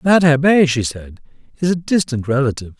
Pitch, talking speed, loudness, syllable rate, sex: 145 Hz, 170 wpm, -16 LUFS, 5.7 syllables/s, male